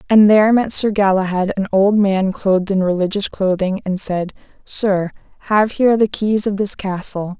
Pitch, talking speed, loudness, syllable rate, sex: 200 Hz, 180 wpm, -16 LUFS, 4.8 syllables/s, female